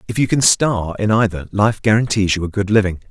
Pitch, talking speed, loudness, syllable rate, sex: 105 Hz, 230 wpm, -16 LUFS, 5.7 syllables/s, male